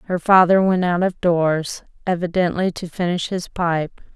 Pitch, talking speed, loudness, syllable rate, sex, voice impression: 175 Hz, 160 wpm, -19 LUFS, 4.5 syllables/s, female, feminine, adult-like, tensed, slightly bright, soft, slightly muffled, slightly halting, calm, slightly friendly, unique, slightly kind, modest